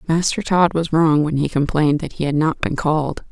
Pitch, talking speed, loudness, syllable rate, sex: 155 Hz, 235 wpm, -18 LUFS, 5.5 syllables/s, female